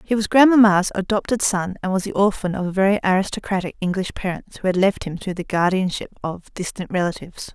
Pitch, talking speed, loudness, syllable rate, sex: 190 Hz, 190 wpm, -20 LUFS, 5.9 syllables/s, female